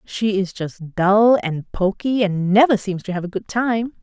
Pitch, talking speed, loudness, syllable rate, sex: 205 Hz, 210 wpm, -19 LUFS, 4.1 syllables/s, female